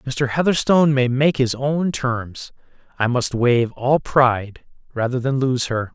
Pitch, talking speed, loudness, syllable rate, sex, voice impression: 130 Hz, 160 wpm, -19 LUFS, 4.1 syllables/s, male, very masculine, very adult-like, very middle-aged, very thick, tensed, powerful, bright, soft, slightly muffled, fluent, slightly raspy, cool, very intellectual, refreshing, sincere, very calm, mature, very friendly, very reassuring, unique, slightly elegant, wild, sweet, lively, kind, slightly modest